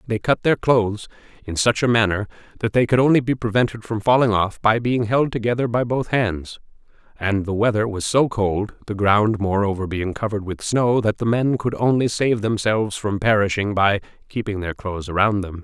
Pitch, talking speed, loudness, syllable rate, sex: 110 Hz, 190 wpm, -20 LUFS, 5.3 syllables/s, male